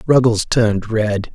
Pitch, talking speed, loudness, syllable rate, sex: 110 Hz, 135 wpm, -17 LUFS, 4.1 syllables/s, male